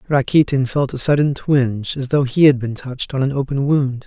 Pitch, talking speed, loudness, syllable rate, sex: 135 Hz, 220 wpm, -17 LUFS, 5.4 syllables/s, male